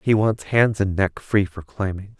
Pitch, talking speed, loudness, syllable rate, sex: 100 Hz, 220 wpm, -21 LUFS, 4.3 syllables/s, male